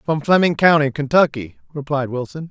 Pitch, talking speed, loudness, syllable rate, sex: 145 Hz, 145 wpm, -17 LUFS, 5.3 syllables/s, male